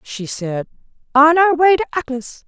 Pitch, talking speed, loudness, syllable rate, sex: 290 Hz, 170 wpm, -16 LUFS, 4.5 syllables/s, female